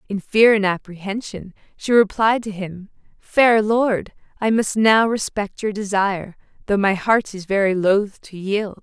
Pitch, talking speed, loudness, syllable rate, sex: 205 Hz, 165 wpm, -19 LUFS, 4.2 syllables/s, female